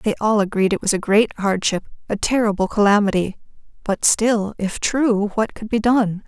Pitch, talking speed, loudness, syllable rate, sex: 210 Hz, 170 wpm, -19 LUFS, 4.8 syllables/s, female